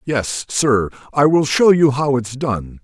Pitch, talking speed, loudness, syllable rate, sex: 135 Hz, 190 wpm, -16 LUFS, 3.6 syllables/s, male